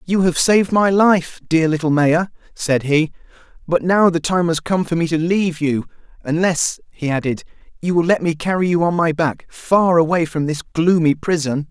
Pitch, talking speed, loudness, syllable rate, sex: 165 Hz, 195 wpm, -17 LUFS, 4.9 syllables/s, male